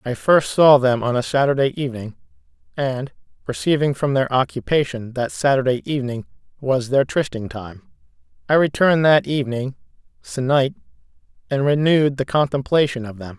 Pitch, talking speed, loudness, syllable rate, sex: 135 Hz, 140 wpm, -19 LUFS, 5.4 syllables/s, male